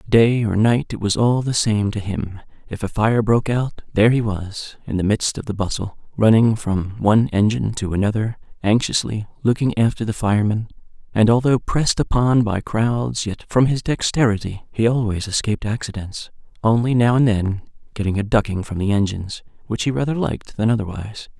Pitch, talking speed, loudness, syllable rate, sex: 110 Hz, 180 wpm, -20 LUFS, 5.4 syllables/s, male